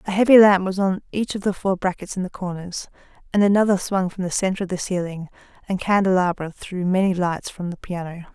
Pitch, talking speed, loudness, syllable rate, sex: 185 Hz, 215 wpm, -21 LUFS, 5.8 syllables/s, female